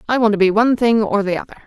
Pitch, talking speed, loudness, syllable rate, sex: 215 Hz, 325 wpm, -16 LUFS, 7.9 syllables/s, female